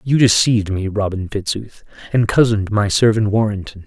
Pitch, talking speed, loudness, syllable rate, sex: 105 Hz, 155 wpm, -17 LUFS, 5.5 syllables/s, male